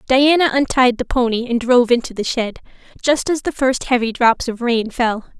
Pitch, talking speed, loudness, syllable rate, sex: 245 Hz, 200 wpm, -17 LUFS, 5.1 syllables/s, female